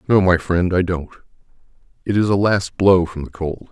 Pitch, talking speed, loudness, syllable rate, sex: 90 Hz, 210 wpm, -18 LUFS, 5.1 syllables/s, male